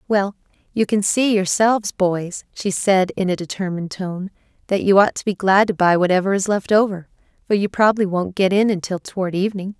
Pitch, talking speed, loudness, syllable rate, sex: 195 Hz, 195 wpm, -19 LUFS, 5.7 syllables/s, female